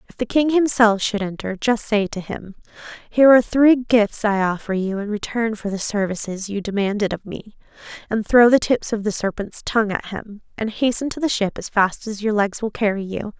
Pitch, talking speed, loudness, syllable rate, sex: 215 Hz, 220 wpm, -20 LUFS, 5.3 syllables/s, female